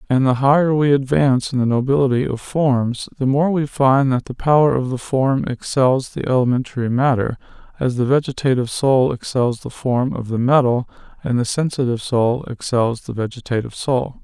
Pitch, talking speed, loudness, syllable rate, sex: 130 Hz, 175 wpm, -18 LUFS, 5.3 syllables/s, male